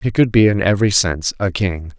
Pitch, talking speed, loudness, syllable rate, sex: 100 Hz, 240 wpm, -16 LUFS, 5.9 syllables/s, male